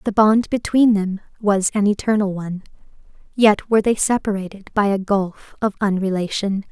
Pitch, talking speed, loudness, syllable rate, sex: 205 Hz, 150 wpm, -19 LUFS, 5.1 syllables/s, female